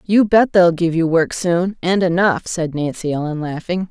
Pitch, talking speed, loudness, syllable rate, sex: 175 Hz, 200 wpm, -17 LUFS, 4.5 syllables/s, female